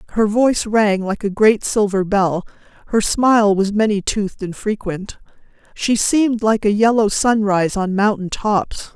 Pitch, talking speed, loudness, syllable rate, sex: 210 Hz, 160 wpm, -17 LUFS, 4.6 syllables/s, female